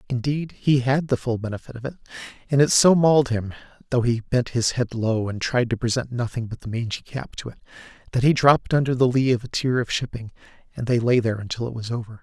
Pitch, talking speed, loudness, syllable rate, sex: 120 Hz, 240 wpm, -22 LUFS, 6.1 syllables/s, male